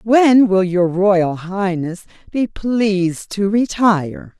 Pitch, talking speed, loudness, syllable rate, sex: 195 Hz, 125 wpm, -16 LUFS, 3.3 syllables/s, female